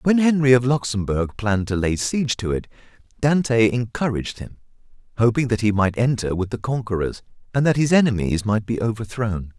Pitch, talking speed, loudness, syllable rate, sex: 115 Hz, 175 wpm, -21 LUFS, 5.6 syllables/s, male